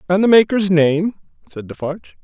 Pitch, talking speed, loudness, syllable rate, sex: 175 Hz, 160 wpm, -16 LUFS, 5.4 syllables/s, male